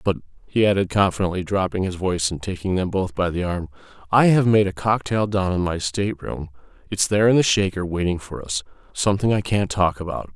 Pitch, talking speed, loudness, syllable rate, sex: 95 Hz, 205 wpm, -21 LUFS, 5.8 syllables/s, male